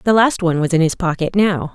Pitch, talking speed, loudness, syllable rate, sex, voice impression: 180 Hz, 275 wpm, -16 LUFS, 5.9 syllables/s, female, feminine, adult-like, calm, elegant